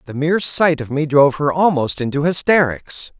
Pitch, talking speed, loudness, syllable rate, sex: 145 Hz, 190 wpm, -16 LUFS, 5.3 syllables/s, male